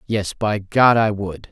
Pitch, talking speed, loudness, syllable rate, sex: 105 Hz, 200 wpm, -18 LUFS, 3.7 syllables/s, male